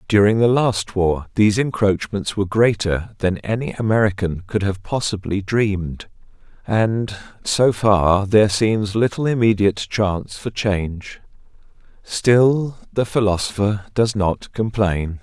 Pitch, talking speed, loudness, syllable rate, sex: 105 Hz, 120 wpm, -19 LUFS, 4.2 syllables/s, male